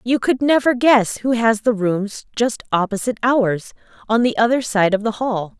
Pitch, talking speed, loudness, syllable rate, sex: 225 Hz, 195 wpm, -18 LUFS, 4.7 syllables/s, female